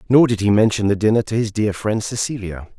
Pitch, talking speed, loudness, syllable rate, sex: 105 Hz, 235 wpm, -18 LUFS, 5.9 syllables/s, male